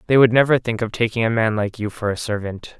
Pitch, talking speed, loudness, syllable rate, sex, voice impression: 115 Hz, 280 wpm, -19 LUFS, 6.1 syllables/s, male, masculine, adult-like, slightly refreshing, slightly calm, slightly unique